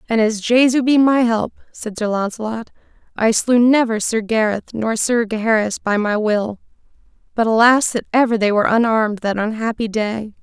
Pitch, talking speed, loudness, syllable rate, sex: 225 Hz, 175 wpm, -17 LUFS, 5.1 syllables/s, female